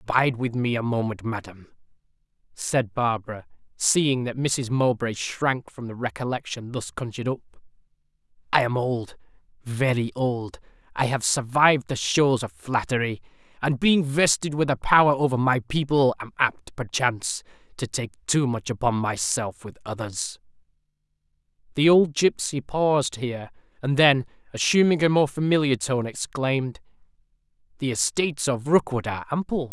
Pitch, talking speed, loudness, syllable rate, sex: 125 Hz, 140 wpm, -24 LUFS, 4.8 syllables/s, male